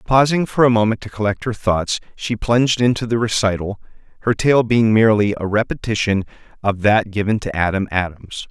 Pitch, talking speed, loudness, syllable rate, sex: 110 Hz, 175 wpm, -18 LUFS, 5.5 syllables/s, male